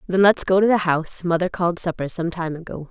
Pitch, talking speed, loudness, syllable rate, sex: 175 Hz, 250 wpm, -20 LUFS, 6.2 syllables/s, female